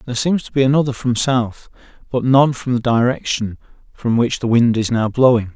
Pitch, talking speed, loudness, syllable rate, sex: 120 Hz, 205 wpm, -17 LUFS, 5.4 syllables/s, male